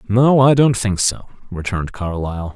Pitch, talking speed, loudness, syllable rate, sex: 105 Hz, 165 wpm, -17 LUFS, 5.1 syllables/s, male